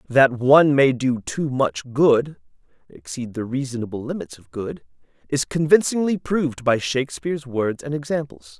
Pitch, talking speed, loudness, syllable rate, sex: 135 Hz, 145 wpm, -21 LUFS, 3.8 syllables/s, male